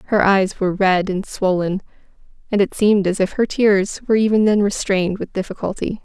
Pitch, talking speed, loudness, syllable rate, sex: 195 Hz, 190 wpm, -18 LUFS, 5.5 syllables/s, female